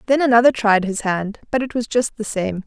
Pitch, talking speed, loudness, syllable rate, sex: 225 Hz, 250 wpm, -18 LUFS, 5.5 syllables/s, female